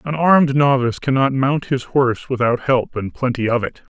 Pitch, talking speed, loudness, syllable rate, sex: 130 Hz, 195 wpm, -17 LUFS, 5.3 syllables/s, male